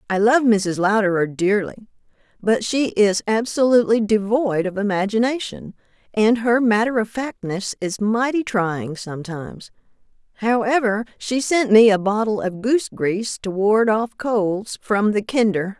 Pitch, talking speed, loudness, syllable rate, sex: 215 Hz, 140 wpm, -19 LUFS, 4.5 syllables/s, female